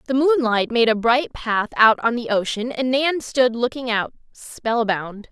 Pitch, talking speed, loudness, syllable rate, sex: 240 Hz, 180 wpm, -20 LUFS, 4.1 syllables/s, female